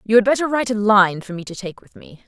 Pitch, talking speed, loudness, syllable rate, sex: 210 Hz, 315 wpm, -17 LUFS, 6.5 syllables/s, female